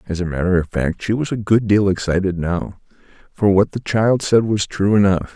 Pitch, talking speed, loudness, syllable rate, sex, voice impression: 100 Hz, 225 wpm, -18 LUFS, 5.1 syllables/s, male, masculine, adult-like, slightly thick, slightly muffled, cool, slightly calm